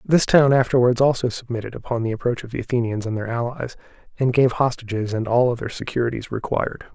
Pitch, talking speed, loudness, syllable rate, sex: 120 Hz, 190 wpm, -21 LUFS, 6.3 syllables/s, male